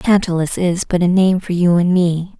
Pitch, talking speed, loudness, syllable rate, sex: 180 Hz, 225 wpm, -15 LUFS, 4.8 syllables/s, female